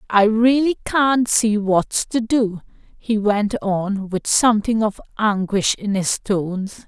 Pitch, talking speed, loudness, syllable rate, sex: 210 Hz, 150 wpm, -19 LUFS, 3.5 syllables/s, female